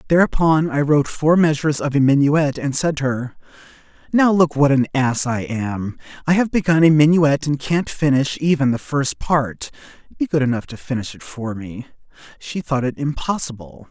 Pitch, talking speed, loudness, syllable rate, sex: 145 Hz, 185 wpm, -18 LUFS, 5.0 syllables/s, male